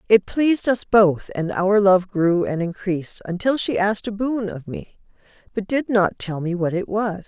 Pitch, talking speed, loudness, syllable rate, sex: 200 Hz, 205 wpm, -21 LUFS, 4.7 syllables/s, female